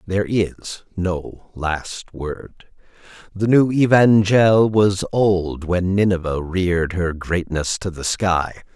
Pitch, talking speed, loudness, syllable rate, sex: 95 Hz, 125 wpm, -19 LUFS, 3.3 syllables/s, male